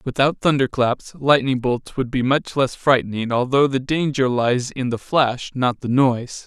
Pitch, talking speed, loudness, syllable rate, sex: 130 Hz, 175 wpm, -20 LUFS, 4.4 syllables/s, male